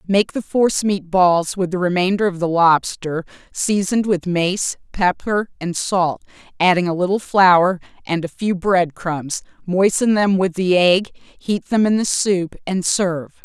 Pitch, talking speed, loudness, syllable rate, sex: 185 Hz, 165 wpm, -18 LUFS, 4.2 syllables/s, female